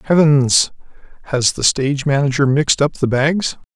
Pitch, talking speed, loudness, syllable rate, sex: 140 Hz, 145 wpm, -16 LUFS, 5.0 syllables/s, male